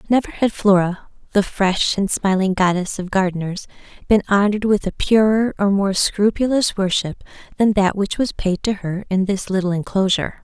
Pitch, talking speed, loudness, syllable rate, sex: 195 Hz, 170 wpm, -18 LUFS, 5.0 syllables/s, female